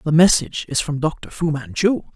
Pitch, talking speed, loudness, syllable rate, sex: 165 Hz, 195 wpm, -19 LUFS, 5.3 syllables/s, female